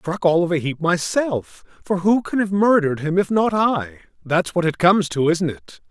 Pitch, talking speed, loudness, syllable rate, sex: 175 Hz, 235 wpm, -19 LUFS, 5.1 syllables/s, male